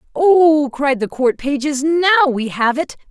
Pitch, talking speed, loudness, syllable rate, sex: 290 Hz, 175 wpm, -15 LUFS, 4.2 syllables/s, female